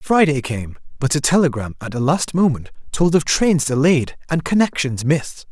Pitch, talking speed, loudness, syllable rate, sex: 145 Hz, 175 wpm, -18 LUFS, 4.9 syllables/s, male